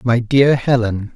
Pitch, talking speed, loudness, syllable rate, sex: 120 Hz, 155 wpm, -15 LUFS, 3.8 syllables/s, male